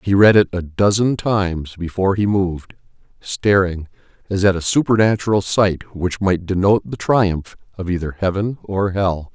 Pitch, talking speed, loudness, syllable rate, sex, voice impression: 95 Hz, 160 wpm, -18 LUFS, 4.9 syllables/s, male, masculine, very adult-like, slightly thick, slightly fluent, cool, slightly intellectual, slightly kind